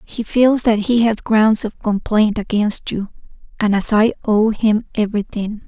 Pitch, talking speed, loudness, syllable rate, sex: 215 Hz, 170 wpm, -17 LUFS, 4.3 syllables/s, female